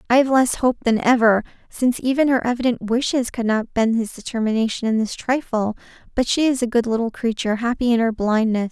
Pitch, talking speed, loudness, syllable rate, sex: 235 Hz, 205 wpm, -20 LUFS, 5.9 syllables/s, female